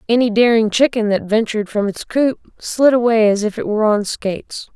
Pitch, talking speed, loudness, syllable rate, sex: 220 Hz, 200 wpm, -16 LUFS, 5.4 syllables/s, female